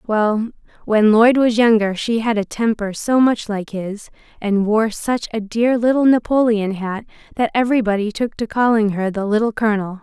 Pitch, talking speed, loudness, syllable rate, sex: 220 Hz, 180 wpm, -17 LUFS, 4.9 syllables/s, female